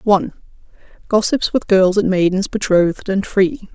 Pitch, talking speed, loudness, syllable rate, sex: 195 Hz, 145 wpm, -16 LUFS, 5.1 syllables/s, female